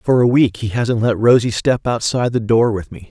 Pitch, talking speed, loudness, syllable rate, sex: 115 Hz, 250 wpm, -16 LUFS, 5.3 syllables/s, male